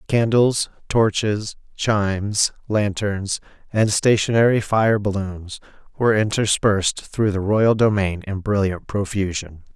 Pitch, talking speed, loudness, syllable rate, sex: 105 Hz, 105 wpm, -20 LUFS, 4.0 syllables/s, male